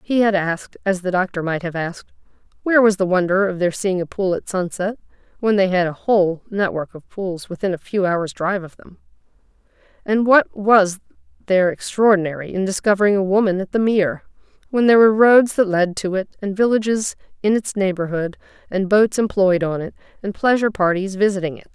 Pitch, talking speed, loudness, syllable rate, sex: 195 Hz, 195 wpm, -19 LUFS, 5.8 syllables/s, female